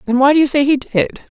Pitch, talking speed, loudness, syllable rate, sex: 270 Hz, 300 wpm, -14 LUFS, 6.1 syllables/s, female